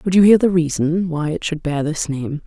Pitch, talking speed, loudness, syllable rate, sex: 165 Hz, 265 wpm, -18 LUFS, 5.1 syllables/s, female